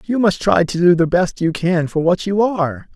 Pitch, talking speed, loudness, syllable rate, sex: 175 Hz, 265 wpm, -16 LUFS, 5.0 syllables/s, male